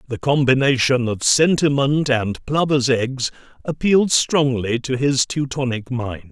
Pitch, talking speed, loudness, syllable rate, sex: 130 Hz, 125 wpm, -18 LUFS, 4.2 syllables/s, male